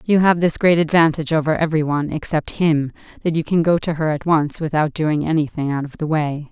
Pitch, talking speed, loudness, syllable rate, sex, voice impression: 155 Hz, 230 wpm, -19 LUFS, 5.9 syllables/s, female, very feminine, adult-like, slightly middle-aged, thin, slightly tensed, slightly weak, bright, soft, clear, fluent, slightly raspy, cool, very intellectual, refreshing, very sincere, calm, very friendly, very reassuring, slightly unique, elegant, very sweet, slightly lively, very kind, slightly modest